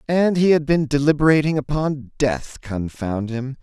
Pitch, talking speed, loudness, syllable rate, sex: 140 Hz, 130 wpm, -20 LUFS, 4.5 syllables/s, male